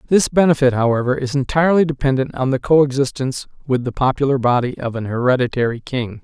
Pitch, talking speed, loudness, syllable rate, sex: 130 Hz, 165 wpm, -17 LUFS, 6.2 syllables/s, male